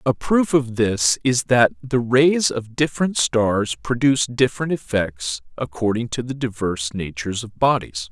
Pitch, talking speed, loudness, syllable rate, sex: 120 Hz, 155 wpm, -20 LUFS, 4.6 syllables/s, male